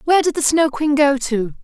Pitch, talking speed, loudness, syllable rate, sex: 285 Hz, 260 wpm, -17 LUFS, 5.5 syllables/s, female